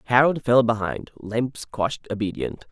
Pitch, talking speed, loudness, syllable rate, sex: 115 Hz, 135 wpm, -23 LUFS, 4.5 syllables/s, male